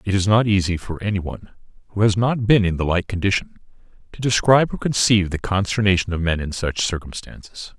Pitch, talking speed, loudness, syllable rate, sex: 100 Hz, 200 wpm, -20 LUFS, 6.1 syllables/s, male